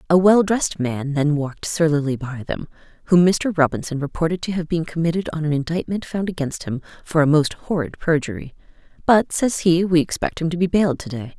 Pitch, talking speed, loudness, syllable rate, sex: 160 Hz, 200 wpm, -20 LUFS, 5.6 syllables/s, female